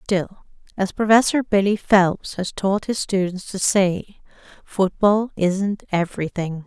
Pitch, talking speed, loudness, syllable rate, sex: 195 Hz, 125 wpm, -20 LUFS, 3.9 syllables/s, female